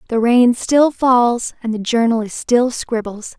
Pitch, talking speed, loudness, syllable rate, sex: 235 Hz, 160 wpm, -16 LUFS, 3.9 syllables/s, female